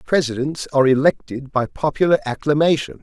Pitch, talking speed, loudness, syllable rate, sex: 140 Hz, 120 wpm, -19 LUFS, 5.6 syllables/s, male